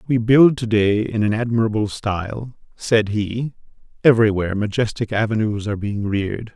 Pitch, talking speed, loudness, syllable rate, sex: 110 Hz, 145 wpm, -19 LUFS, 5.2 syllables/s, male